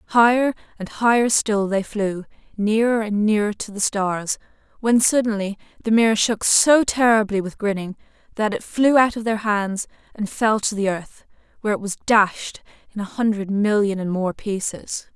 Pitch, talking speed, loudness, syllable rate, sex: 210 Hz, 175 wpm, -20 LUFS, 4.7 syllables/s, female